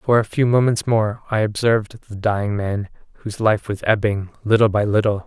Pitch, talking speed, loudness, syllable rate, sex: 105 Hz, 195 wpm, -19 LUFS, 5.3 syllables/s, male